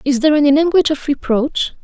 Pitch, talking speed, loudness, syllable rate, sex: 285 Hz, 195 wpm, -15 LUFS, 6.6 syllables/s, female